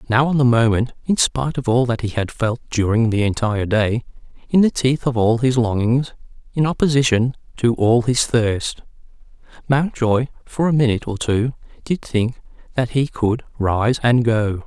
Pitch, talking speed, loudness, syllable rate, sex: 120 Hz, 175 wpm, -19 LUFS, 4.8 syllables/s, male